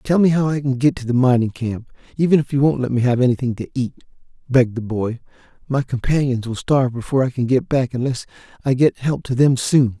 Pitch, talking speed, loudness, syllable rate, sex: 130 Hz, 235 wpm, -19 LUFS, 6.1 syllables/s, male